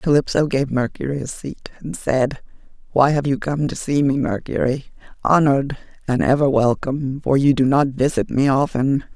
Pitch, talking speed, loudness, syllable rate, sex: 140 Hz, 155 wpm, -19 LUFS, 5.0 syllables/s, female